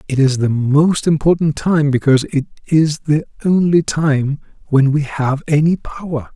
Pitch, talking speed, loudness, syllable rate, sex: 150 Hz, 160 wpm, -16 LUFS, 4.6 syllables/s, male